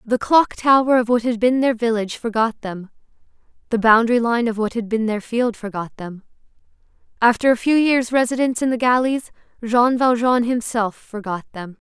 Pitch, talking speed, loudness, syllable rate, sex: 235 Hz, 175 wpm, -18 LUFS, 5.2 syllables/s, female